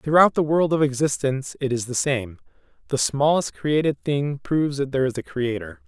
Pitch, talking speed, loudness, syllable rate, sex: 140 Hz, 195 wpm, -22 LUFS, 5.3 syllables/s, male